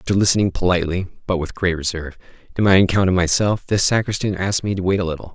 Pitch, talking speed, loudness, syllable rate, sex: 95 Hz, 225 wpm, -19 LUFS, 7.0 syllables/s, male